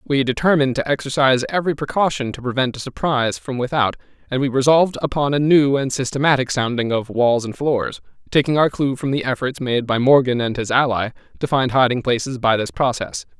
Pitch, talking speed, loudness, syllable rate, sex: 130 Hz, 195 wpm, -19 LUFS, 5.9 syllables/s, male